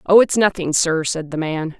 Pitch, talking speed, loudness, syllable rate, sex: 170 Hz, 235 wpm, -18 LUFS, 4.8 syllables/s, female